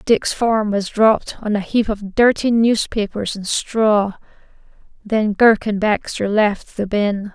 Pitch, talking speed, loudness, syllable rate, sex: 210 Hz, 155 wpm, -18 LUFS, 3.8 syllables/s, female